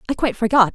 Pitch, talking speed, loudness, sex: 235 Hz, 245 wpm, -18 LUFS, female